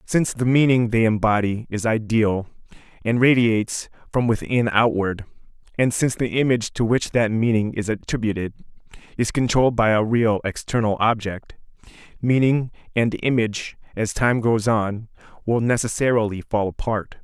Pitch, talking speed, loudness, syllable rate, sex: 115 Hz, 140 wpm, -21 LUFS, 5.1 syllables/s, male